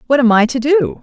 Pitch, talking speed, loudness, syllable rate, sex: 255 Hz, 290 wpm, -13 LUFS, 5.8 syllables/s, female